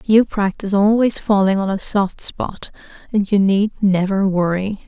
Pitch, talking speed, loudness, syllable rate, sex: 200 Hz, 160 wpm, -17 LUFS, 4.5 syllables/s, female